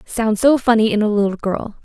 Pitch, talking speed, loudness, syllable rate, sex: 220 Hz, 260 wpm, -16 LUFS, 6.0 syllables/s, female